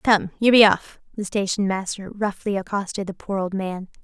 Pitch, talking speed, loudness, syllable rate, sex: 195 Hz, 195 wpm, -22 LUFS, 5.0 syllables/s, female